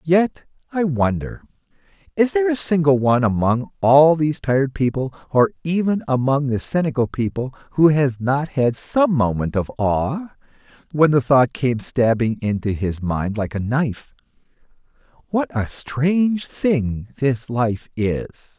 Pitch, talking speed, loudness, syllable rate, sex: 135 Hz, 145 wpm, -19 LUFS, 4.3 syllables/s, male